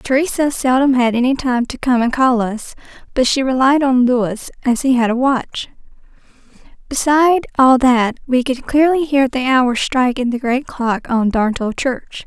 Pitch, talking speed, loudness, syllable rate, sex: 255 Hz, 180 wpm, -15 LUFS, 4.7 syllables/s, female